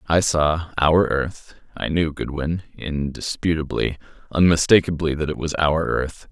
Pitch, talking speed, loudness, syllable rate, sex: 80 Hz, 125 wpm, -21 LUFS, 4.3 syllables/s, male